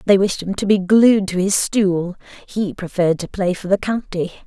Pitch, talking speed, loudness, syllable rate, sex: 190 Hz, 215 wpm, -18 LUFS, 4.7 syllables/s, female